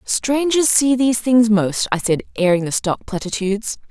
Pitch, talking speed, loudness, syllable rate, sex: 220 Hz, 170 wpm, -17 LUFS, 4.8 syllables/s, female